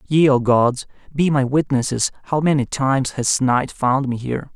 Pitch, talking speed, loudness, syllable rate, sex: 135 Hz, 185 wpm, -19 LUFS, 4.8 syllables/s, male